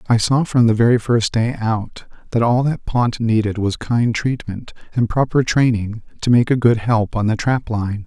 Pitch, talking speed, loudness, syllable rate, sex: 115 Hz, 210 wpm, -18 LUFS, 4.6 syllables/s, male